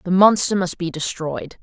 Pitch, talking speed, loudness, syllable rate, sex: 185 Hz, 185 wpm, -19 LUFS, 4.7 syllables/s, female